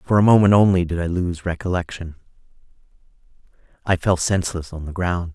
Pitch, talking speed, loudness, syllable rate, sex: 90 Hz, 155 wpm, -20 LUFS, 5.9 syllables/s, male